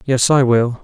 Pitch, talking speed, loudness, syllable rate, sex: 125 Hz, 215 wpm, -14 LUFS, 4.1 syllables/s, male